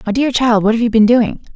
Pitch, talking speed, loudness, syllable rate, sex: 230 Hz, 310 wpm, -13 LUFS, 6.2 syllables/s, female